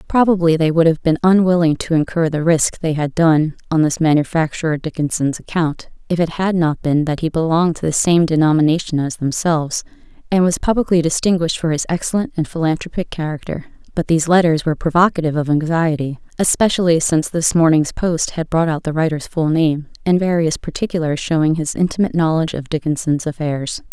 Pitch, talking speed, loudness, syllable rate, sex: 160 Hz, 180 wpm, -17 LUFS, 5.9 syllables/s, female